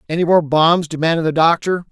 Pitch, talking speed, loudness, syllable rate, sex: 165 Hz, 190 wpm, -15 LUFS, 5.9 syllables/s, male